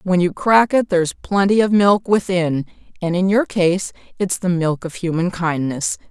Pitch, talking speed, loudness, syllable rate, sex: 185 Hz, 175 wpm, -18 LUFS, 4.6 syllables/s, female